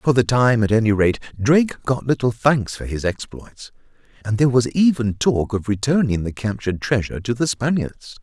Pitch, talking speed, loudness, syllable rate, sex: 115 Hz, 180 wpm, -19 LUFS, 5.2 syllables/s, male